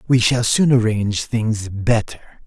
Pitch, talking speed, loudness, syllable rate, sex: 115 Hz, 145 wpm, -18 LUFS, 3.9 syllables/s, male